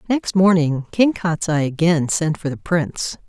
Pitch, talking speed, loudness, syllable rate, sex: 170 Hz, 165 wpm, -19 LUFS, 4.3 syllables/s, female